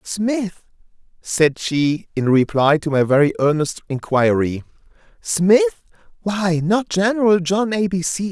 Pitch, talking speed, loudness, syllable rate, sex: 175 Hz, 125 wpm, -18 LUFS, 4.0 syllables/s, male